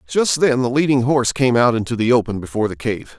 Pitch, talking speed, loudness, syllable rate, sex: 120 Hz, 245 wpm, -17 LUFS, 6.3 syllables/s, male